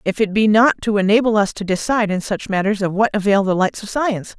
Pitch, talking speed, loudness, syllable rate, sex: 205 Hz, 260 wpm, -17 LUFS, 6.3 syllables/s, female